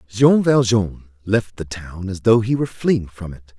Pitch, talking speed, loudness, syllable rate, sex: 105 Hz, 200 wpm, -18 LUFS, 4.4 syllables/s, male